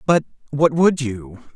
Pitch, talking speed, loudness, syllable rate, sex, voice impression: 145 Hz, 155 wpm, -19 LUFS, 3.9 syllables/s, male, masculine, adult-like, tensed, slightly powerful, bright, soft, fluent, cool, intellectual, refreshing, friendly, wild, lively, slightly kind